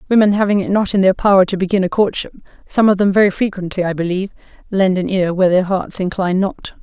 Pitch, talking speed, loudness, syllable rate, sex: 190 Hz, 230 wpm, -16 LUFS, 6.6 syllables/s, female